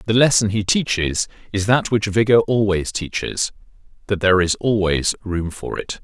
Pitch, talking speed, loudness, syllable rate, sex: 105 Hz, 160 wpm, -19 LUFS, 4.8 syllables/s, male